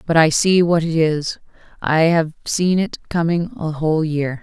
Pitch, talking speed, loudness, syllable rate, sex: 160 Hz, 175 wpm, -18 LUFS, 4.3 syllables/s, female